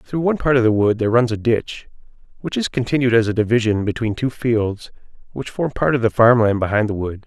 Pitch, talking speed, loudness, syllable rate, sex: 120 Hz, 240 wpm, -18 LUFS, 5.9 syllables/s, male